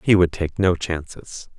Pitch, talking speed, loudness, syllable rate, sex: 85 Hz, 190 wpm, -21 LUFS, 4.2 syllables/s, male